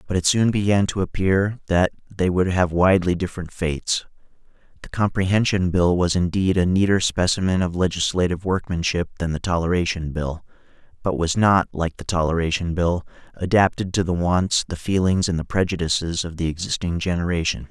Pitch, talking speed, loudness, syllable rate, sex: 90 Hz, 165 wpm, -21 LUFS, 5.5 syllables/s, male